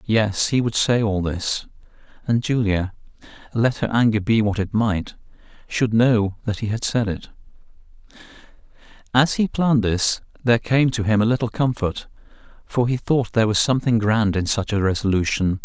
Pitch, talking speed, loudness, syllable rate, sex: 110 Hz, 170 wpm, -20 LUFS, 5.0 syllables/s, male